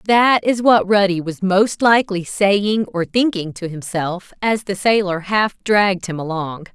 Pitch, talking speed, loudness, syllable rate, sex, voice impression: 195 Hz, 170 wpm, -17 LUFS, 4.3 syllables/s, female, very feminine, slightly adult-like, slightly thin, tensed, slightly powerful, bright, slightly soft, clear, fluent, cool, intellectual, very refreshing, sincere, calm, friendly, slightly reassuring, very unique, slightly elegant, wild, slightly sweet, very lively, kind, slightly intense, slightly sharp